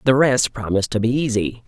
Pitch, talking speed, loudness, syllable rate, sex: 115 Hz, 215 wpm, -19 LUFS, 5.9 syllables/s, male